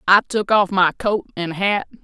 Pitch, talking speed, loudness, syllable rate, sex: 195 Hz, 205 wpm, -18 LUFS, 4.4 syllables/s, female